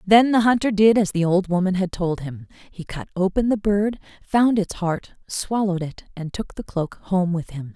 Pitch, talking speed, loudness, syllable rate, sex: 190 Hz, 215 wpm, -21 LUFS, 4.8 syllables/s, female